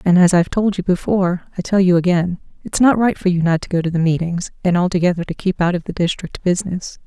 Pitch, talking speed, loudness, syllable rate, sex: 180 Hz, 255 wpm, -17 LUFS, 6.4 syllables/s, female